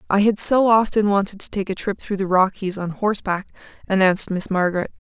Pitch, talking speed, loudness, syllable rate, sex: 195 Hz, 200 wpm, -20 LUFS, 6.0 syllables/s, female